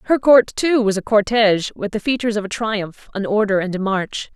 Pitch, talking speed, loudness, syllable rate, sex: 210 Hz, 235 wpm, -18 LUFS, 5.5 syllables/s, female